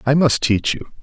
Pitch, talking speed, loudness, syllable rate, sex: 130 Hz, 235 wpm, -17 LUFS, 4.8 syllables/s, male